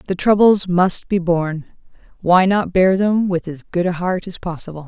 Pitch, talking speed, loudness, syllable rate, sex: 180 Hz, 185 wpm, -17 LUFS, 4.6 syllables/s, female